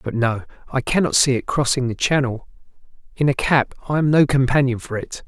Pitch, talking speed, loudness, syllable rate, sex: 130 Hz, 205 wpm, -19 LUFS, 5.6 syllables/s, male